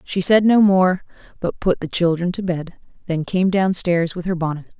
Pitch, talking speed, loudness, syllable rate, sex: 180 Hz, 215 wpm, -19 LUFS, 5.0 syllables/s, female